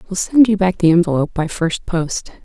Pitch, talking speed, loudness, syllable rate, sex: 180 Hz, 220 wpm, -16 LUFS, 5.5 syllables/s, female